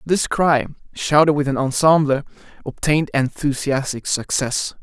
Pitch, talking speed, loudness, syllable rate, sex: 140 Hz, 110 wpm, -19 LUFS, 4.6 syllables/s, male